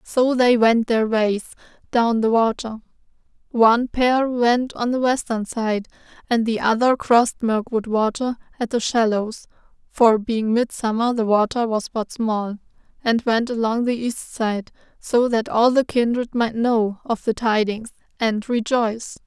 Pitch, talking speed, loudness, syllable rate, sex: 230 Hz, 155 wpm, -20 LUFS, 3.8 syllables/s, female